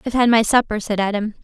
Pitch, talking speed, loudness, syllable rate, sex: 220 Hz, 250 wpm, -18 LUFS, 7.1 syllables/s, female